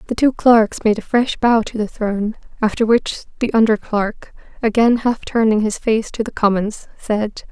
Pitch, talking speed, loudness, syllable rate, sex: 220 Hz, 190 wpm, -17 LUFS, 4.7 syllables/s, female